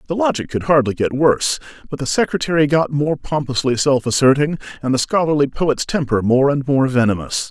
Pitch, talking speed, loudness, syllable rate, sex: 140 Hz, 185 wpm, -17 LUFS, 5.6 syllables/s, male